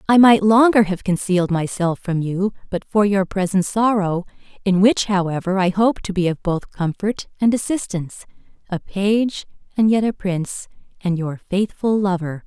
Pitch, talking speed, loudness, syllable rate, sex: 195 Hz, 165 wpm, -19 LUFS, 4.8 syllables/s, female